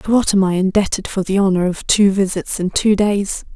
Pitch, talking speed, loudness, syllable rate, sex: 195 Hz, 235 wpm, -16 LUFS, 5.2 syllables/s, female